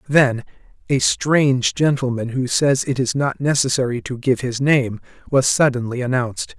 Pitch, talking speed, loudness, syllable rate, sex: 130 Hz, 155 wpm, -19 LUFS, 4.7 syllables/s, male